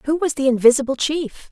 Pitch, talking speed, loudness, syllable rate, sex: 275 Hz, 200 wpm, -18 LUFS, 5.8 syllables/s, female